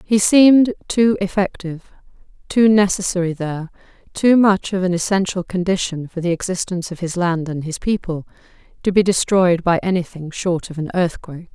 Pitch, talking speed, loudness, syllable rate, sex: 185 Hz, 160 wpm, -18 LUFS, 5.3 syllables/s, female